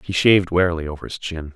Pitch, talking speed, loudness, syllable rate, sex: 85 Hz, 230 wpm, -20 LUFS, 7.0 syllables/s, male